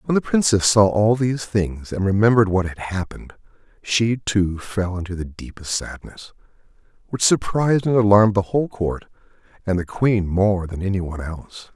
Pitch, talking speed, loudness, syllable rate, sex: 100 Hz, 170 wpm, -20 LUFS, 5.2 syllables/s, male